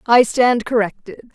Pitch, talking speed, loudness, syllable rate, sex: 230 Hz, 135 wpm, -16 LUFS, 4.1 syllables/s, female